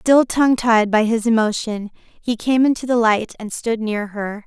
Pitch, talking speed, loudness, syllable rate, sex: 225 Hz, 200 wpm, -18 LUFS, 4.4 syllables/s, female